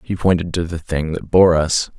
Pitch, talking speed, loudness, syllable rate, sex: 85 Hz, 240 wpm, -17 LUFS, 4.9 syllables/s, male